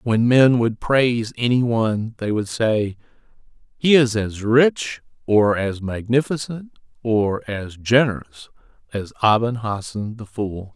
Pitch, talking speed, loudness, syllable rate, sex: 115 Hz, 135 wpm, -20 LUFS, 3.9 syllables/s, male